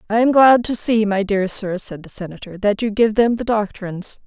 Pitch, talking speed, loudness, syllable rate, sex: 210 Hz, 240 wpm, -17 LUFS, 5.2 syllables/s, female